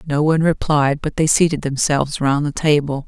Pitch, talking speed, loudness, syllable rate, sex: 150 Hz, 195 wpm, -17 LUFS, 5.5 syllables/s, female